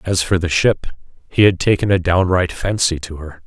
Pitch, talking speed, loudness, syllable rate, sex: 90 Hz, 210 wpm, -17 LUFS, 5.0 syllables/s, male